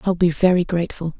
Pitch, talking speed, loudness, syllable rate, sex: 175 Hz, 200 wpm, -19 LUFS, 6.5 syllables/s, female